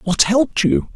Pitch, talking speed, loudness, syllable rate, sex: 180 Hz, 190 wpm, -16 LUFS, 4.7 syllables/s, male